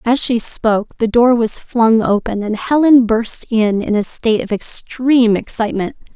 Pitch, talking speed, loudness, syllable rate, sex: 225 Hz, 175 wpm, -15 LUFS, 4.6 syllables/s, female